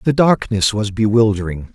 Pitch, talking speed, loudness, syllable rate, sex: 110 Hz, 135 wpm, -16 LUFS, 4.9 syllables/s, male